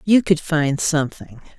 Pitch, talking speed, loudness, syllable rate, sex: 160 Hz, 150 wpm, -19 LUFS, 4.5 syllables/s, female